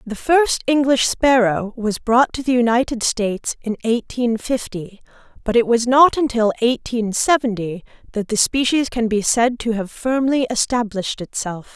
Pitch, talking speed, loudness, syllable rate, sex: 235 Hz, 160 wpm, -18 LUFS, 4.5 syllables/s, female